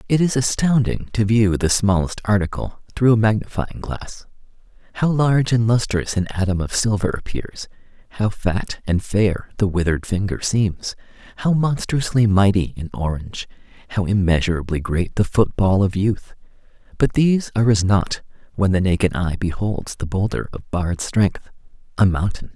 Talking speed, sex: 155 wpm, male